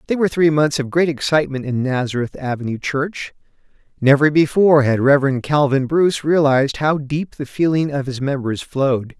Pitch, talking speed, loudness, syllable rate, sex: 140 Hz, 170 wpm, -17 LUFS, 5.5 syllables/s, male